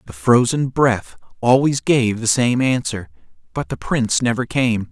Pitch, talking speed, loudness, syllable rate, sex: 115 Hz, 160 wpm, -18 LUFS, 4.4 syllables/s, male